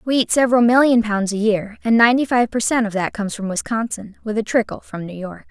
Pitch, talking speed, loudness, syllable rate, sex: 220 Hz, 240 wpm, -18 LUFS, 6.1 syllables/s, female